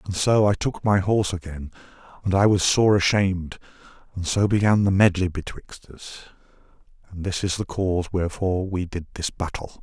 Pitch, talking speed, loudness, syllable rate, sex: 95 Hz, 175 wpm, -22 LUFS, 5.5 syllables/s, male